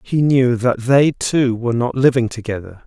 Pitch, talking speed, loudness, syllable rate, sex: 125 Hz, 190 wpm, -16 LUFS, 4.9 syllables/s, male